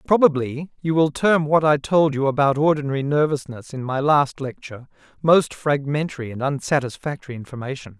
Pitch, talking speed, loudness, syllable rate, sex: 145 Hz, 150 wpm, -21 LUFS, 5.5 syllables/s, male